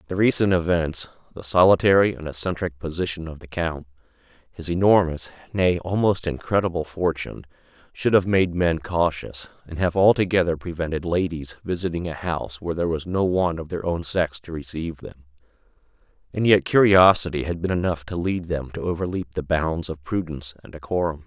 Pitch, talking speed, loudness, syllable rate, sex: 85 Hz, 165 wpm, -22 LUFS, 5.6 syllables/s, male